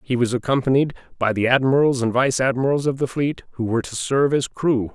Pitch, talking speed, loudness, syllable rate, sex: 130 Hz, 220 wpm, -20 LUFS, 6.0 syllables/s, male